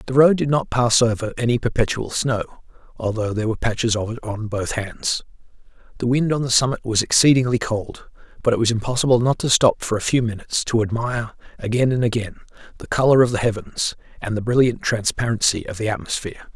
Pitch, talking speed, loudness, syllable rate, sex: 115 Hz, 195 wpm, -20 LUFS, 6.0 syllables/s, male